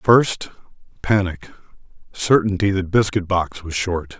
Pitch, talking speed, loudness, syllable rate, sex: 100 Hz, 115 wpm, -20 LUFS, 4.0 syllables/s, male